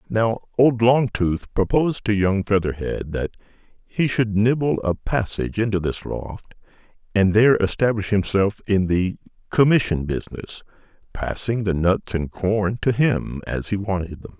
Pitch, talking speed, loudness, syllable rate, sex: 105 Hz, 145 wpm, -21 LUFS, 4.6 syllables/s, male